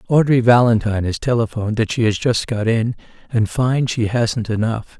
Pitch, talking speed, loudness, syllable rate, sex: 115 Hz, 180 wpm, -18 LUFS, 5.2 syllables/s, male